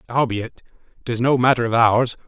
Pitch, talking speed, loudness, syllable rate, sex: 120 Hz, 160 wpm, -19 LUFS, 5.1 syllables/s, male